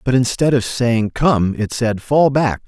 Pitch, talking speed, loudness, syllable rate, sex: 125 Hz, 200 wpm, -16 LUFS, 3.9 syllables/s, male